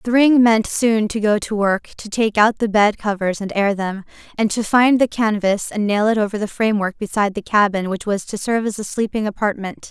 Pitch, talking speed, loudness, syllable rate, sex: 210 Hz, 230 wpm, -18 LUFS, 5.3 syllables/s, female